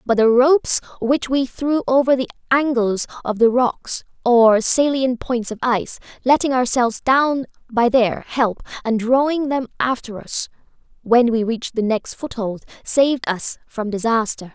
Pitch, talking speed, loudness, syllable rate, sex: 245 Hz, 155 wpm, -19 LUFS, 4.5 syllables/s, female